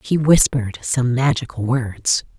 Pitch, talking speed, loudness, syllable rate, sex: 125 Hz, 125 wpm, -18 LUFS, 4.2 syllables/s, female